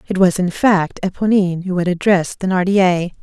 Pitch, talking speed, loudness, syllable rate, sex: 185 Hz, 165 wpm, -16 LUFS, 5.4 syllables/s, female